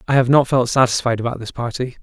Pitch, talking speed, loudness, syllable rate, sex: 125 Hz, 235 wpm, -18 LUFS, 6.6 syllables/s, male